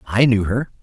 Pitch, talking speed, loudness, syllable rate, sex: 115 Hz, 220 wpm, -18 LUFS, 4.9 syllables/s, male